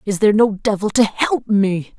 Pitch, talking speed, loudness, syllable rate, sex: 210 Hz, 210 wpm, -17 LUFS, 4.9 syllables/s, female